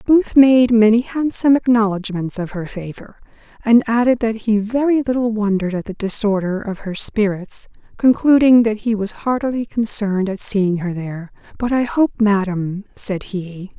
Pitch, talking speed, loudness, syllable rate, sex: 215 Hz, 160 wpm, -17 LUFS, 4.8 syllables/s, female